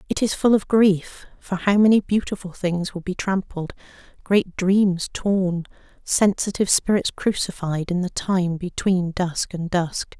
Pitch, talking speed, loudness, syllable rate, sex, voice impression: 185 Hz, 155 wpm, -21 LUFS, 4.1 syllables/s, female, very feminine, adult-like, slightly muffled, slightly fluent, elegant, slightly sweet, kind